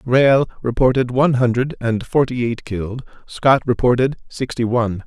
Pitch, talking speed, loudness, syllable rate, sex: 125 Hz, 140 wpm, -18 LUFS, 4.9 syllables/s, male